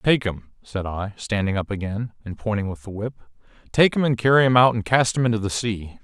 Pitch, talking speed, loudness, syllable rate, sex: 110 Hz, 240 wpm, -22 LUFS, 5.7 syllables/s, male